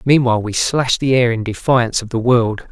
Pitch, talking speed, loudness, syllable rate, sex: 120 Hz, 220 wpm, -16 LUFS, 5.4 syllables/s, male